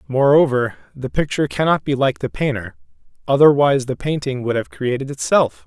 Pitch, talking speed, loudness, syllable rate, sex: 130 Hz, 160 wpm, -18 LUFS, 5.6 syllables/s, male